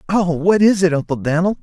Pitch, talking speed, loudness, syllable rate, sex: 175 Hz, 220 wpm, -16 LUFS, 4.9 syllables/s, male